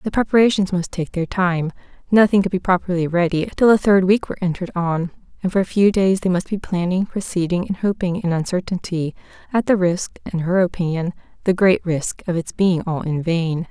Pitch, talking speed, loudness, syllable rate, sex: 180 Hz, 195 wpm, -19 LUFS, 5.5 syllables/s, female